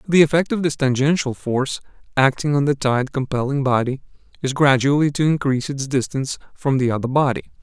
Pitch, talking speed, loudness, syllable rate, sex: 135 Hz, 175 wpm, -20 LUFS, 6.0 syllables/s, male